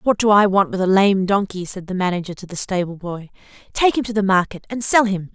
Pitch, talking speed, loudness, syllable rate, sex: 195 Hz, 245 wpm, -18 LUFS, 5.9 syllables/s, female